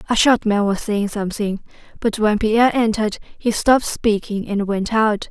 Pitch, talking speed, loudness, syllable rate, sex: 215 Hz, 180 wpm, -19 LUFS, 5.0 syllables/s, female